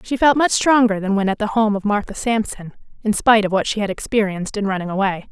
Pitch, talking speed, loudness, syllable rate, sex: 210 Hz, 250 wpm, -18 LUFS, 6.3 syllables/s, female